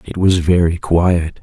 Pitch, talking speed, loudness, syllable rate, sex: 85 Hz, 170 wpm, -15 LUFS, 3.8 syllables/s, male